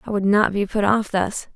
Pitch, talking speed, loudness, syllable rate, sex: 205 Hz, 270 wpm, -20 LUFS, 5.0 syllables/s, female